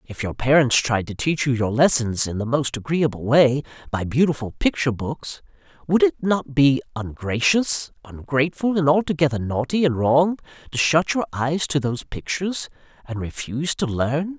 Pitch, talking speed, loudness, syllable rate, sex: 140 Hz, 165 wpm, -21 LUFS, 4.9 syllables/s, male